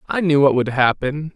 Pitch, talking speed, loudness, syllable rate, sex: 145 Hz, 220 wpm, -17 LUFS, 5.1 syllables/s, male